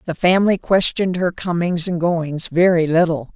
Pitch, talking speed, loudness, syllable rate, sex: 170 Hz, 160 wpm, -17 LUFS, 5.0 syllables/s, female